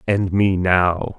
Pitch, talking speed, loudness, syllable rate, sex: 95 Hz, 150 wpm, -18 LUFS, 3.0 syllables/s, male